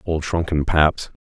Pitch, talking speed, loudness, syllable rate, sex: 80 Hz, 145 wpm, -20 LUFS, 3.9 syllables/s, male